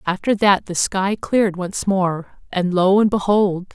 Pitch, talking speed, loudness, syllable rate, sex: 190 Hz, 175 wpm, -18 LUFS, 4.1 syllables/s, female